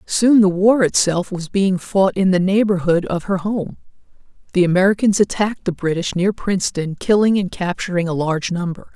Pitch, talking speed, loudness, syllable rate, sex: 190 Hz, 175 wpm, -18 LUFS, 5.3 syllables/s, female